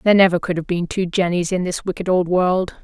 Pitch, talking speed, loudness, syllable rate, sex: 180 Hz, 255 wpm, -19 LUFS, 5.9 syllables/s, female